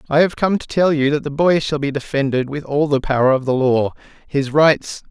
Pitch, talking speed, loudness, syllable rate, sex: 145 Hz, 245 wpm, -17 LUFS, 5.3 syllables/s, male